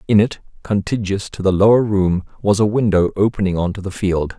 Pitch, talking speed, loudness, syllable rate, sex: 100 Hz, 205 wpm, -17 LUFS, 5.5 syllables/s, male